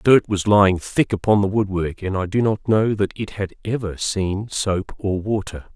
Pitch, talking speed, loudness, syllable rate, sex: 100 Hz, 220 wpm, -20 LUFS, 4.6 syllables/s, male